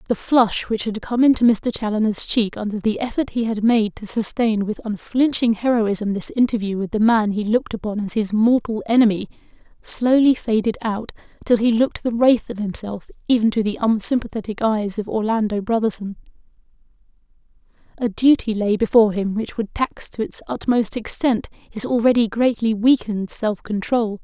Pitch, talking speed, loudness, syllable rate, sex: 220 Hz, 170 wpm, -20 LUFS, 5.2 syllables/s, female